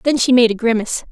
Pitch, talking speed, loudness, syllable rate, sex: 240 Hz, 270 wpm, -15 LUFS, 7.3 syllables/s, female